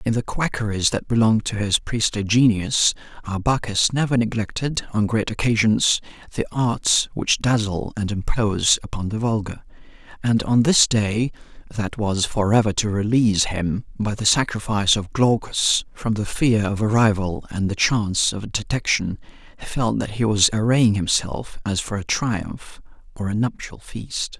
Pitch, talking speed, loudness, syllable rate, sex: 110 Hz, 160 wpm, -21 LUFS, 4.6 syllables/s, male